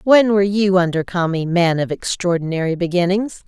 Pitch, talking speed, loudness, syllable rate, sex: 180 Hz, 155 wpm, -17 LUFS, 5.4 syllables/s, female